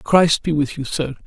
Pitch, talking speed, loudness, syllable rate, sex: 150 Hz, 240 wpm, -19 LUFS, 4.4 syllables/s, male